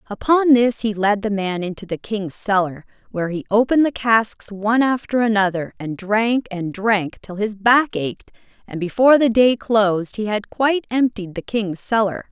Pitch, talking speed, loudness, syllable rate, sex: 215 Hz, 185 wpm, -19 LUFS, 4.8 syllables/s, female